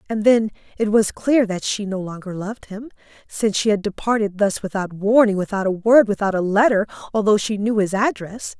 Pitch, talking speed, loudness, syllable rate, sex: 205 Hz, 200 wpm, -19 LUFS, 5.5 syllables/s, female